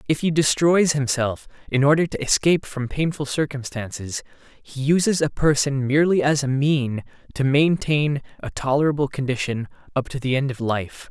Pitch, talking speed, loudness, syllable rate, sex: 140 Hz, 160 wpm, -21 LUFS, 5.1 syllables/s, male